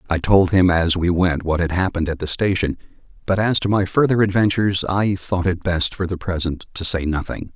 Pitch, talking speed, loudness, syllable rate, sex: 90 Hz, 220 wpm, -19 LUFS, 5.4 syllables/s, male